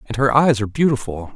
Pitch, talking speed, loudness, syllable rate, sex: 120 Hz, 220 wpm, -17 LUFS, 6.8 syllables/s, male